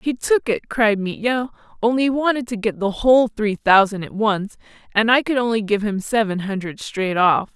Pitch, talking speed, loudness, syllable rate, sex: 220 Hz, 205 wpm, -19 LUFS, 5.0 syllables/s, female